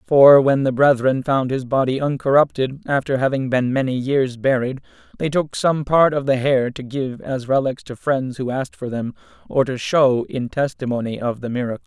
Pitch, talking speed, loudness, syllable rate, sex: 130 Hz, 195 wpm, -19 LUFS, 5.0 syllables/s, male